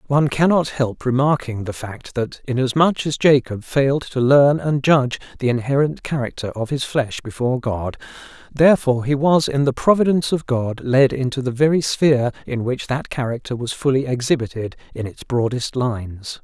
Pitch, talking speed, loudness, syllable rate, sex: 130 Hz, 170 wpm, -19 LUFS, 5.2 syllables/s, male